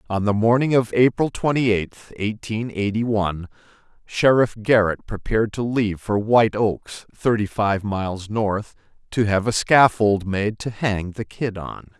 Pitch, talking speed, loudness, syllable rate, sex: 105 Hz, 160 wpm, -21 LUFS, 4.5 syllables/s, male